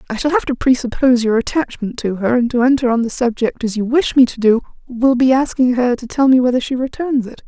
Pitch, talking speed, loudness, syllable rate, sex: 250 Hz, 255 wpm, -16 LUFS, 6.0 syllables/s, female